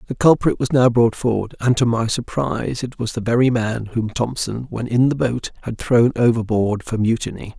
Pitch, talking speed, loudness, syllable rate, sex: 115 Hz, 205 wpm, -19 LUFS, 5.1 syllables/s, male